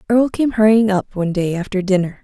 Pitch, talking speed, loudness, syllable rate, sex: 200 Hz, 215 wpm, -17 LUFS, 6.4 syllables/s, female